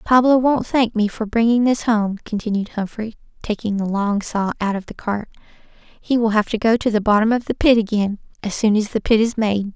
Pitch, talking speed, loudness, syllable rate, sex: 220 Hz, 230 wpm, -19 LUFS, 5.3 syllables/s, female